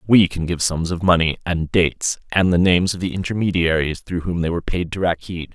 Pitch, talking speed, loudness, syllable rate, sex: 85 Hz, 225 wpm, -19 LUFS, 5.8 syllables/s, male